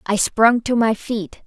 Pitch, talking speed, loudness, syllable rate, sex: 220 Hz, 205 wpm, -18 LUFS, 3.7 syllables/s, female